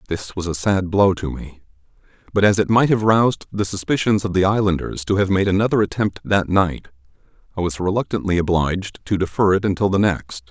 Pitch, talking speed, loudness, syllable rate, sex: 95 Hz, 200 wpm, -19 LUFS, 5.8 syllables/s, male